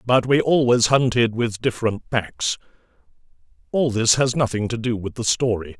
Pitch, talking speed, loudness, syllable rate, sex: 115 Hz, 165 wpm, -20 LUFS, 4.9 syllables/s, male